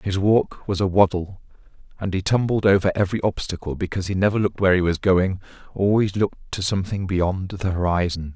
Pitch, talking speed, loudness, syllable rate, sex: 95 Hz, 185 wpm, -21 LUFS, 6.0 syllables/s, male